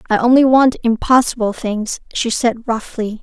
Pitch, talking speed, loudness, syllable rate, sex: 235 Hz, 150 wpm, -15 LUFS, 4.6 syllables/s, female